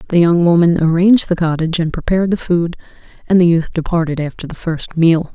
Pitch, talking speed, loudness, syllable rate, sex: 170 Hz, 200 wpm, -15 LUFS, 6.1 syllables/s, female